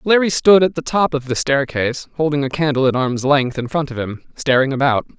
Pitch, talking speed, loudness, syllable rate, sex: 140 Hz, 230 wpm, -17 LUFS, 5.7 syllables/s, male